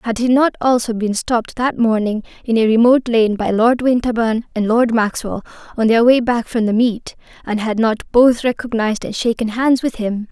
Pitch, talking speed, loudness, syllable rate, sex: 230 Hz, 205 wpm, -16 LUFS, 5.3 syllables/s, female